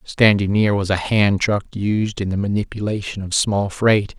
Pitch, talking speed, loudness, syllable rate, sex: 100 Hz, 185 wpm, -19 LUFS, 4.5 syllables/s, male